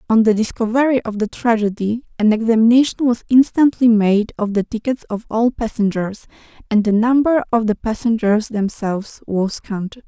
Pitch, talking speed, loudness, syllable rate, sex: 225 Hz, 155 wpm, -17 LUFS, 5.1 syllables/s, female